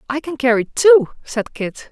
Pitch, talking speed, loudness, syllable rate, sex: 260 Hz, 190 wpm, -17 LUFS, 4.3 syllables/s, female